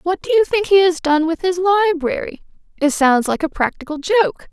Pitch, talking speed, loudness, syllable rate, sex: 335 Hz, 225 wpm, -17 LUFS, 6.0 syllables/s, female